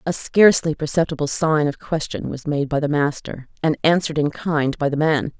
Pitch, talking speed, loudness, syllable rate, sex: 150 Hz, 200 wpm, -20 LUFS, 5.3 syllables/s, female